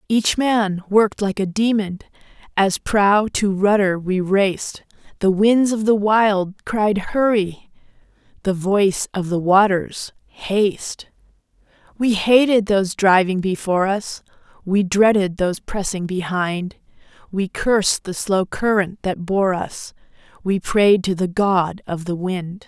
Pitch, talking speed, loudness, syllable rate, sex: 195 Hz, 140 wpm, -19 LUFS, 3.9 syllables/s, female